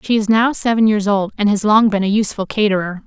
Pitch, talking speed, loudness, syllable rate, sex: 210 Hz, 255 wpm, -15 LUFS, 6.2 syllables/s, female